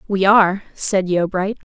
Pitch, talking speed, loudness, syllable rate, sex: 190 Hz, 140 wpm, -17 LUFS, 4.4 syllables/s, female